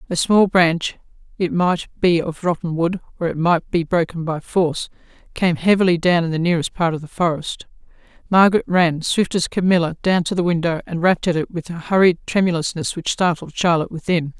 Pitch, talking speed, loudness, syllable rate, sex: 170 Hz, 190 wpm, -19 LUFS, 5.6 syllables/s, female